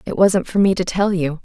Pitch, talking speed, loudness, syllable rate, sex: 185 Hz, 290 wpm, -17 LUFS, 5.3 syllables/s, female